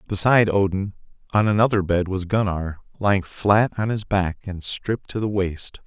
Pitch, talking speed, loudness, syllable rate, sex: 100 Hz, 175 wpm, -22 LUFS, 4.9 syllables/s, male